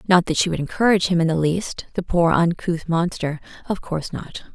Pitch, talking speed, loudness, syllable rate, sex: 170 Hz, 185 wpm, -21 LUFS, 5.6 syllables/s, female